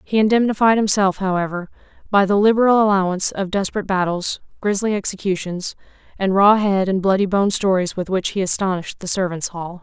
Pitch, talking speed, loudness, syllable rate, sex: 195 Hz, 165 wpm, -18 LUFS, 6.0 syllables/s, female